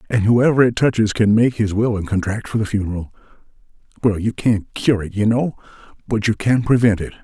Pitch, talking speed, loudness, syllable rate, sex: 110 Hz, 205 wpm, -18 LUFS, 5.6 syllables/s, male